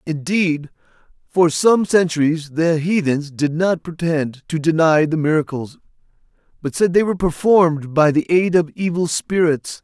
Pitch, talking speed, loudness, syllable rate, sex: 165 Hz, 145 wpm, -18 LUFS, 4.5 syllables/s, male